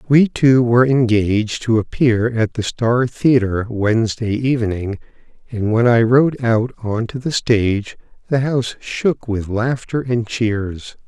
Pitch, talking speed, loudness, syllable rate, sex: 115 Hz, 150 wpm, -17 LUFS, 4.1 syllables/s, male